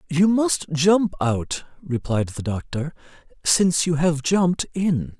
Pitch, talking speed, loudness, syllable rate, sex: 160 Hz, 140 wpm, -21 LUFS, 3.8 syllables/s, male